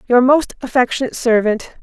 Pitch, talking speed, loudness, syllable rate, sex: 245 Hz, 130 wpm, -16 LUFS, 5.7 syllables/s, female